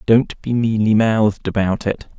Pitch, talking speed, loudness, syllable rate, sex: 110 Hz, 165 wpm, -18 LUFS, 4.5 syllables/s, male